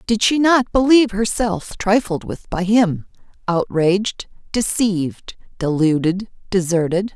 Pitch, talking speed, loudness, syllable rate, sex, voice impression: 200 Hz, 110 wpm, -18 LUFS, 4.2 syllables/s, female, feminine, middle-aged, tensed, powerful, bright, raspy, intellectual, calm, slightly friendly, slightly reassuring, lively, slightly sharp